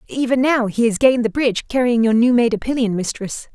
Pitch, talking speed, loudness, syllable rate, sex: 235 Hz, 235 wpm, -17 LUFS, 6.0 syllables/s, female